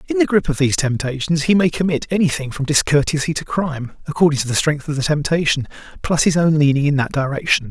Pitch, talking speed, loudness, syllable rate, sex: 145 Hz, 210 wpm, -18 LUFS, 6.4 syllables/s, male